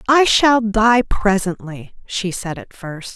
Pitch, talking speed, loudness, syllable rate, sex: 210 Hz, 150 wpm, -16 LUFS, 3.5 syllables/s, female